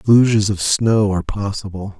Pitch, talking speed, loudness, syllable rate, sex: 105 Hz, 150 wpm, -17 LUFS, 5.2 syllables/s, male